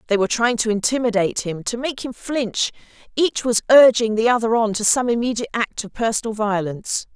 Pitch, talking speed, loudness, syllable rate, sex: 225 Hz, 185 wpm, -19 LUFS, 5.8 syllables/s, female